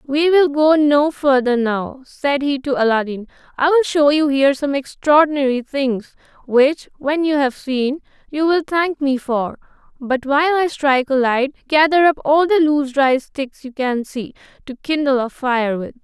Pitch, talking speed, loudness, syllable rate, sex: 280 Hz, 185 wpm, -17 LUFS, 4.5 syllables/s, female